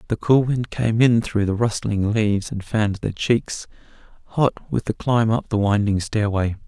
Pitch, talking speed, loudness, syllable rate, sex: 110 Hz, 200 wpm, -21 LUFS, 4.6 syllables/s, male